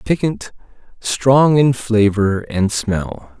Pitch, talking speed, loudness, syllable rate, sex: 115 Hz, 105 wpm, -16 LUFS, 2.9 syllables/s, male